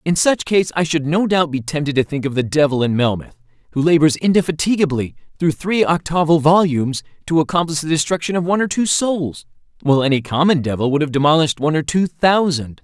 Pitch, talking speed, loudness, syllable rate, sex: 155 Hz, 200 wpm, -17 LUFS, 6.1 syllables/s, male